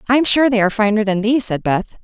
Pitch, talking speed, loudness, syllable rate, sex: 220 Hz, 265 wpm, -16 LUFS, 6.5 syllables/s, female